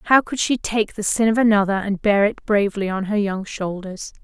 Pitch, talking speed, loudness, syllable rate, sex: 205 Hz, 225 wpm, -20 LUFS, 5.1 syllables/s, female